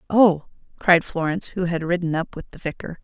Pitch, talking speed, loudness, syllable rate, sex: 175 Hz, 200 wpm, -22 LUFS, 5.7 syllables/s, female